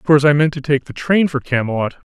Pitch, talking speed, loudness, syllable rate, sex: 145 Hz, 285 wpm, -17 LUFS, 6.5 syllables/s, male